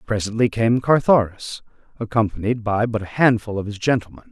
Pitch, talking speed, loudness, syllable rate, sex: 110 Hz, 155 wpm, -20 LUFS, 5.6 syllables/s, male